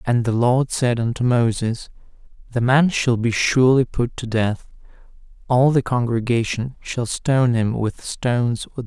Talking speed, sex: 170 wpm, male